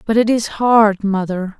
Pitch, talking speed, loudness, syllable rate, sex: 210 Hz, 190 wpm, -15 LUFS, 4.1 syllables/s, female